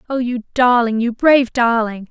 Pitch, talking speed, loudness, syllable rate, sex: 240 Hz, 170 wpm, -16 LUFS, 4.9 syllables/s, female